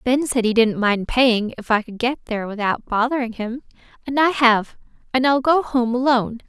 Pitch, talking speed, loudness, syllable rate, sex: 240 Hz, 205 wpm, -19 LUFS, 5.1 syllables/s, female